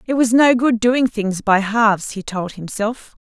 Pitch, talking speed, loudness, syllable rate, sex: 220 Hz, 205 wpm, -17 LUFS, 4.3 syllables/s, female